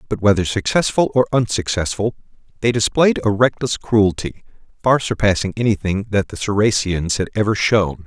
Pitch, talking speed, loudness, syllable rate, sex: 105 Hz, 140 wpm, -18 LUFS, 5.2 syllables/s, male